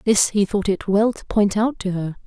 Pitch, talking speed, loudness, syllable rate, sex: 205 Hz, 265 wpm, -20 LUFS, 4.8 syllables/s, female